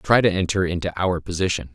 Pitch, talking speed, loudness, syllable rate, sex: 90 Hz, 205 wpm, -22 LUFS, 6.1 syllables/s, male